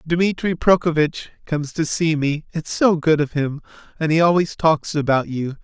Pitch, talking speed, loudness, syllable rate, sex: 155 Hz, 180 wpm, -19 LUFS, 4.7 syllables/s, male